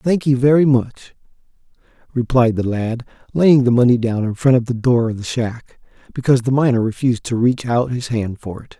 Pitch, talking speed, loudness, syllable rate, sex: 125 Hz, 210 wpm, -17 LUFS, 5.6 syllables/s, male